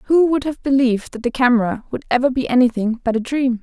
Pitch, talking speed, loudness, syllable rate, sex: 250 Hz, 230 wpm, -18 LUFS, 6.1 syllables/s, female